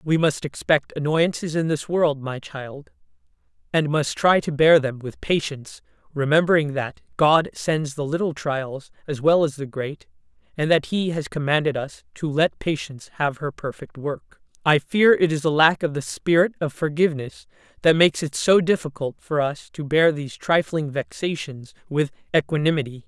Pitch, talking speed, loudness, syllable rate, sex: 150 Hz, 175 wpm, -22 LUFS, 4.8 syllables/s, female